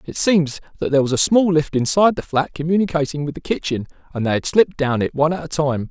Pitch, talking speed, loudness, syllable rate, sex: 155 Hz, 255 wpm, -19 LUFS, 6.5 syllables/s, male